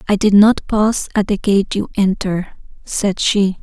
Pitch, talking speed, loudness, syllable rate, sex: 200 Hz, 180 wpm, -16 LUFS, 4.7 syllables/s, female